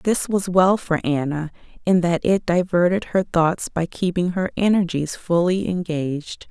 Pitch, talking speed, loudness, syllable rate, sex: 175 Hz, 155 wpm, -21 LUFS, 4.3 syllables/s, female